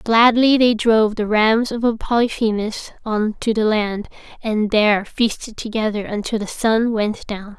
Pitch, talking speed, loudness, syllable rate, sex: 220 Hz, 160 wpm, -18 LUFS, 4.3 syllables/s, female